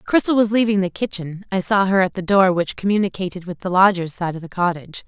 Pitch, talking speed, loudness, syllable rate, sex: 190 Hz, 235 wpm, -19 LUFS, 6.2 syllables/s, female